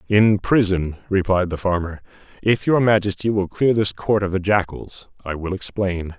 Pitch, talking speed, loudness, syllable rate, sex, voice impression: 95 Hz, 175 wpm, -20 LUFS, 4.8 syllables/s, male, very masculine, very adult-like, very middle-aged, very thick, very tensed, very powerful, bright, soft, slightly muffled, fluent, very cool, very intellectual, slightly refreshing, sincere, very calm, very mature, very friendly, unique, elegant, wild, slightly sweet, lively, very kind